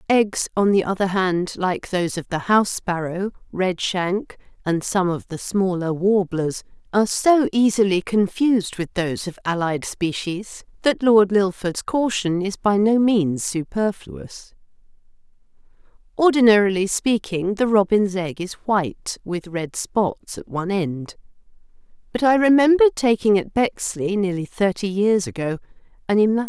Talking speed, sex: 145 wpm, female